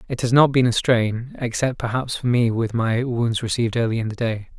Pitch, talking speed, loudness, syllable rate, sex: 120 Hz, 235 wpm, -21 LUFS, 5.4 syllables/s, male